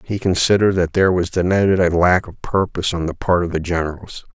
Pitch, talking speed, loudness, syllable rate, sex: 90 Hz, 220 wpm, -18 LUFS, 6.2 syllables/s, male